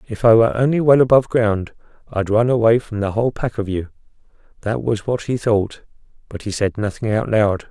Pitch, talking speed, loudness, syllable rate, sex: 110 Hz, 210 wpm, -18 LUFS, 5.7 syllables/s, male